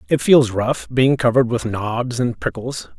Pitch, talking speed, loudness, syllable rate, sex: 120 Hz, 180 wpm, -18 LUFS, 4.4 syllables/s, male